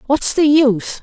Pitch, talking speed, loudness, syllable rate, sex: 270 Hz, 175 wpm, -14 LUFS, 4.6 syllables/s, female